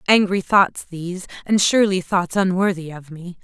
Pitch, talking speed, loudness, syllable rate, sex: 185 Hz, 140 wpm, -19 LUFS, 5.0 syllables/s, female